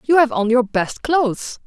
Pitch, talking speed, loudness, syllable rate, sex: 250 Hz, 215 wpm, -18 LUFS, 4.6 syllables/s, female